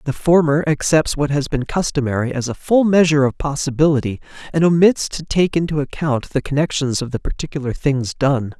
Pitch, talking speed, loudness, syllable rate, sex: 145 Hz, 180 wpm, -18 LUFS, 5.6 syllables/s, male